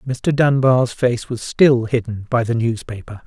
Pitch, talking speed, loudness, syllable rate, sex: 120 Hz, 165 wpm, -18 LUFS, 4.2 syllables/s, male